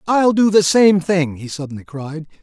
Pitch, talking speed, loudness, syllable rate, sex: 175 Hz, 200 wpm, -15 LUFS, 4.6 syllables/s, male